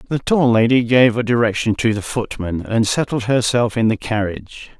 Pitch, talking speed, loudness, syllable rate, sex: 115 Hz, 190 wpm, -17 LUFS, 5.1 syllables/s, male